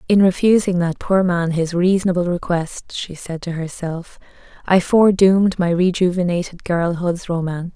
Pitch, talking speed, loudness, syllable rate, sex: 175 Hz, 140 wpm, -18 LUFS, 4.9 syllables/s, female